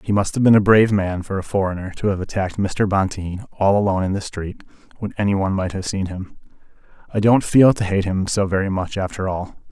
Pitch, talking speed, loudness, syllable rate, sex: 100 Hz, 230 wpm, -19 LUFS, 6.1 syllables/s, male